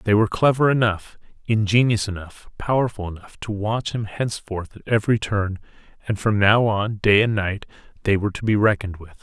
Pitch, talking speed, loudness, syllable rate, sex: 105 Hz, 175 wpm, -21 LUFS, 5.7 syllables/s, male